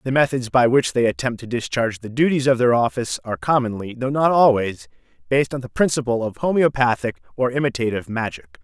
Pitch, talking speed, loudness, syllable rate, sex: 120 Hz, 190 wpm, -20 LUFS, 6.2 syllables/s, male